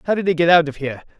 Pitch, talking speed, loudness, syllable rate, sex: 165 Hz, 355 wpm, -16 LUFS, 9.0 syllables/s, male